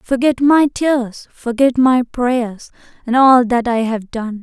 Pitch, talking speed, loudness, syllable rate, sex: 245 Hz, 165 wpm, -15 LUFS, 3.5 syllables/s, female